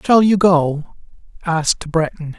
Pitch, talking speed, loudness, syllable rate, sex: 170 Hz, 125 wpm, -16 LUFS, 4.0 syllables/s, male